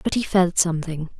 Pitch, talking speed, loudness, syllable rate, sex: 170 Hz, 200 wpm, -21 LUFS, 5.8 syllables/s, female